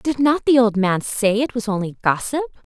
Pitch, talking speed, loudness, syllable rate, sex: 230 Hz, 215 wpm, -19 LUFS, 5.1 syllables/s, female